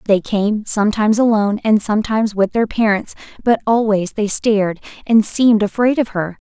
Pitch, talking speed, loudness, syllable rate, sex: 215 Hz, 165 wpm, -16 LUFS, 5.5 syllables/s, female